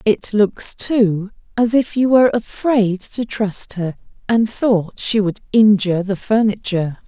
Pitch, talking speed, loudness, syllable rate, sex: 210 Hz, 155 wpm, -17 LUFS, 4.0 syllables/s, female